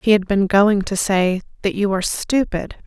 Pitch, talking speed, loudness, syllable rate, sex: 200 Hz, 210 wpm, -18 LUFS, 4.7 syllables/s, female